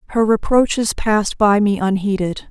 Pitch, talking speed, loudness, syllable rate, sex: 210 Hz, 145 wpm, -17 LUFS, 5.0 syllables/s, female